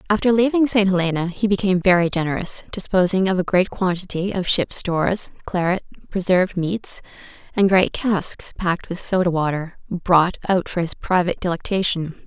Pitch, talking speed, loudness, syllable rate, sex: 185 Hz, 155 wpm, -20 LUFS, 5.2 syllables/s, female